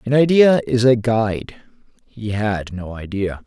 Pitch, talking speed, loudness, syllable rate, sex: 115 Hz, 155 wpm, -18 LUFS, 4.2 syllables/s, male